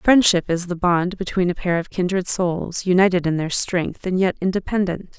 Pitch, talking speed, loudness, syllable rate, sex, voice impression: 180 Hz, 195 wpm, -20 LUFS, 4.9 syllables/s, female, feminine, slightly gender-neutral, slightly young, slightly adult-like, thin, slightly tensed, slightly powerful, hard, clear, fluent, slightly cute, cool, very intellectual, refreshing, very sincere, very calm, very friendly, reassuring, very unique, elegant, very sweet, slightly lively, very kind